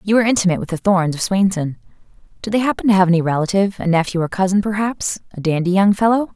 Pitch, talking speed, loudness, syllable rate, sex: 190 Hz, 225 wpm, -17 LUFS, 7.1 syllables/s, female